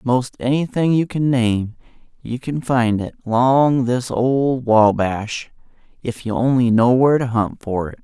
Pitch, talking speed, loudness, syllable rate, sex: 125 Hz, 165 wpm, -18 LUFS, 4.0 syllables/s, male